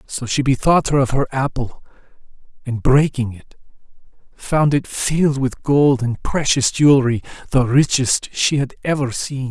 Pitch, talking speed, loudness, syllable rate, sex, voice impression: 135 Hz, 150 wpm, -18 LUFS, 4.4 syllables/s, male, masculine, adult-like, slightly fluent, sincere, slightly lively